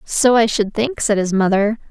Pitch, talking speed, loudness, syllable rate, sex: 215 Hz, 220 wpm, -16 LUFS, 4.7 syllables/s, female